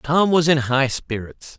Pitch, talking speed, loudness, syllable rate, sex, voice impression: 140 Hz, 190 wpm, -19 LUFS, 3.9 syllables/s, male, masculine, adult-like, slightly powerful, clear, slightly refreshing, unique, slightly sharp